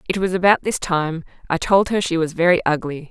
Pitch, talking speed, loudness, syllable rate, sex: 175 Hz, 230 wpm, -19 LUFS, 5.7 syllables/s, female